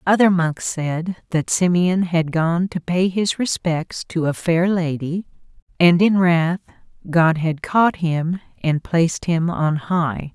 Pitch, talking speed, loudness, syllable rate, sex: 170 Hz, 155 wpm, -19 LUFS, 3.6 syllables/s, female